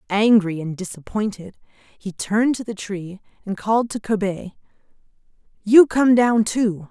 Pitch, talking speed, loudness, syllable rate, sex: 205 Hz, 140 wpm, -20 LUFS, 4.4 syllables/s, female